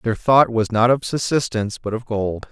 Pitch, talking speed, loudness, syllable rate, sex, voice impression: 115 Hz, 215 wpm, -19 LUFS, 5.0 syllables/s, male, very masculine, very adult-like, slightly old, very thick, tensed, powerful, slightly dark, slightly hard, slightly muffled, fluent, very cool, very intellectual, sincere, very calm, very mature, very friendly, very reassuring, unique, elegant, wild, slightly sweet, slightly lively, kind, slightly modest